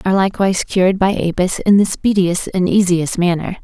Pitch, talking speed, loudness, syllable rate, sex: 185 Hz, 180 wpm, -15 LUFS, 5.7 syllables/s, female